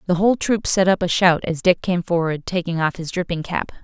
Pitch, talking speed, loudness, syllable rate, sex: 175 Hz, 250 wpm, -20 LUFS, 5.6 syllables/s, female